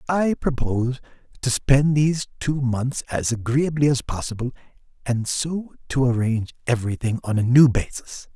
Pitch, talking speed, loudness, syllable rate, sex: 130 Hz, 145 wpm, -22 LUFS, 4.9 syllables/s, male